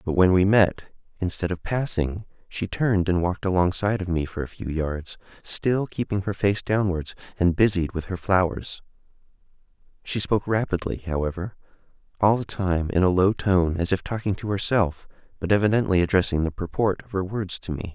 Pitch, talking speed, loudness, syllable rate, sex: 95 Hz, 180 wpm, -24 LUFS, 5.3 syllables/s, male